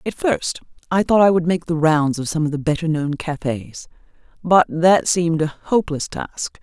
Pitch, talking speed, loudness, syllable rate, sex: 160 Hz, 200 wpm, -19 LUFS, 4.9 syllables/s, female